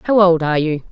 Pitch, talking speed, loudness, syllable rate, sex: 170 Hz, 260 wpm, -15 LUFS, 6.0 syllables/s, female